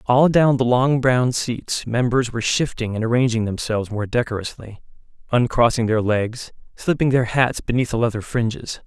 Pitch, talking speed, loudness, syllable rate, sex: 120 Hz, 160 wpm, -20 LUFS, 5.0 syllables/s, male